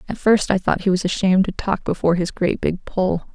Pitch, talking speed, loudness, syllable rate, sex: 185 Hz, 250 wpm, -20 LUFS, 5.9 syllables/s, female